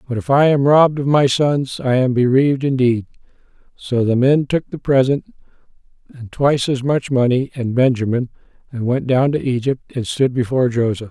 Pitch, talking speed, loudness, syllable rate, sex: 130 Hz, 185 wpm, -17 LUFS, 5.2 syllables/s, male